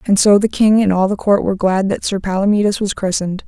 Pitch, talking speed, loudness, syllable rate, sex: 200 Hz, 260 wpm, -15 LUFS, 6.3 syllables/s, female